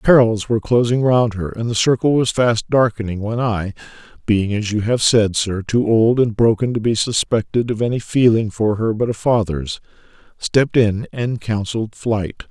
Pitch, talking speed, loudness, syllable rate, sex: 110 Hz, 180 wpm, -18 LUFS, 4.9 syllables/s, male